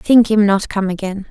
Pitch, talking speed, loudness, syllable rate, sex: 205 Hz, 230 wpm, -15 LUFS, 4.8 syllables/s, female